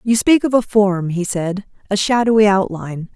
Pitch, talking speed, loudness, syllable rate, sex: 205 Hz, 190 wpm, -16 LUFS, 5.0 syllables/s, female